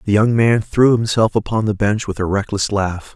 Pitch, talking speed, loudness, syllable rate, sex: 105 Hz, 230 wpm, -17 LUFS, 5.0 syllables/s, male